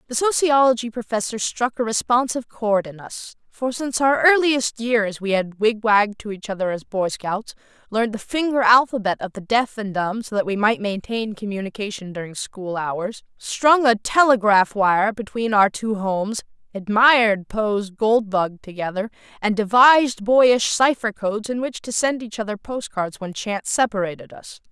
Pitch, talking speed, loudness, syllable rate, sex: 220 Hz, 170 wpm, -20 LUFS, 4.8 syllables/s, female